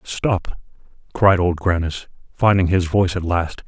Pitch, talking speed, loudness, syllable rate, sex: 90 Hz, 145 wpm, -19 LUFS, 4.4 syllables/s, male